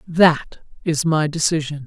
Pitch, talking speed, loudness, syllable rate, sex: 155 Hz, 130 wpm, -19 LUFS, 3.9 syllables/s, female